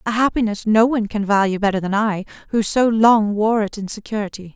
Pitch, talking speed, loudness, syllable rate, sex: 215 Hz, 210 wpm, -18 LUFS, 5.8 syllables/s, female